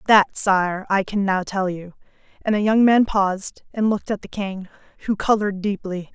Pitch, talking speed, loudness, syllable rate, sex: 200 Hz, 195 wpm, -21 LUFS, 5.0 syllables/s, female